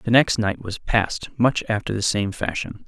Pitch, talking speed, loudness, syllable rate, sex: 110 Hz, 210 wpm, -22 LUFS, 4.7 syllables/s, male